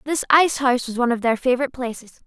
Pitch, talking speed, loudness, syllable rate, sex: 255 Hz, 240 wpm, -20 LUFS, 7.7 syllables/s, female